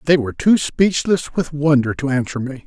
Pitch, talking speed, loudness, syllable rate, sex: 145 Hz, 205 wpm, -18 LUFS, 5.2 syllables/s, male